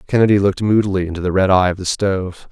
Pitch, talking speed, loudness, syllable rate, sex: 95 Hz, 240 wpm, -16 LUFS, 7.2 syllables/s, male